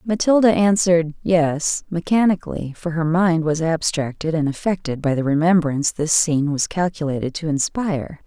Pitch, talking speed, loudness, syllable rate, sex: 165 Hz, 145 wpm, -19 LUFS, 5.2 syllables/s, female